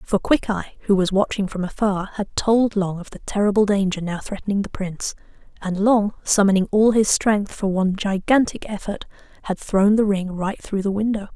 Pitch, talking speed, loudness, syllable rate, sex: 200 Hz, 190 wpm, -21 LUFS, 5.2 syllables/s, female